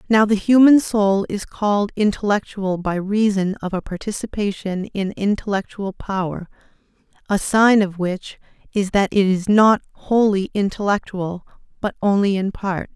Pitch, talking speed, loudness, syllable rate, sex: 200 Hz, 140 wpm, -19 LUFS, 4.5 syllables/s, female